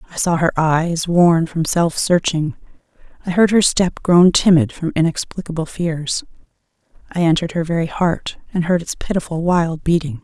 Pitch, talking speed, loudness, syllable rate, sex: 170 Hz, 165 wpm, -17 LUFS, 4.8 syllables/s, female